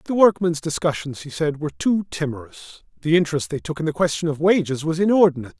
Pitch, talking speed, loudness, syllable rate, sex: 160 Hz, 205 wpm, -21 LUFS, 6.9 syllables/s, male